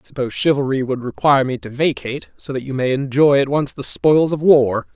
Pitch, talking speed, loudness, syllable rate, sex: 130 Hz, 230 wpm, -17 LUFS, 5.9 syllables/s, male